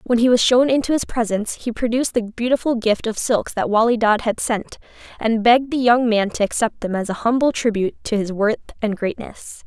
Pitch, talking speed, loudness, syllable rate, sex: 230 Hz, 225 wpm, -19 LUFS, 5.7 syllables/s, female